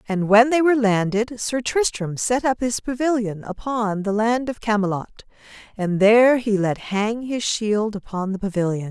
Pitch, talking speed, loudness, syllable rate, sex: 220 Hz, 175 wpm, -20 LUFS, 4.7 syllables/s, female